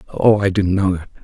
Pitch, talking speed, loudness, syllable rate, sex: 95 Hz, 245 wpm, -17 LUFS, 5.4 syllables/s, male